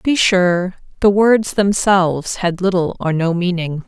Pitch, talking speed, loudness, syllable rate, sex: 185 Hz, 170 wpm, -16 LUFS, 4.2 syllables/s, female